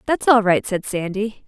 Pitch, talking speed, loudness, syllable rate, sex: 210 Hz, 205 wpm, -19 LUFS, 4.6 syllables/s, female